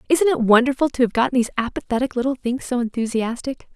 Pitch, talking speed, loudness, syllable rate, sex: 250 Hz, 190 wpm, -20 LUFS, 6.4 syllables/s, female